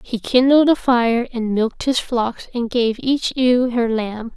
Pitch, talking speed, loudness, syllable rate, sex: 245 Hz, 195 wpm, -18 LUFS, 3.9 syllables/s, female